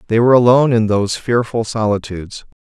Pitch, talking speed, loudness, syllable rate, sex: 115 Hz, 155 wpm, -14 LUFS, 6.6 syllables/s, male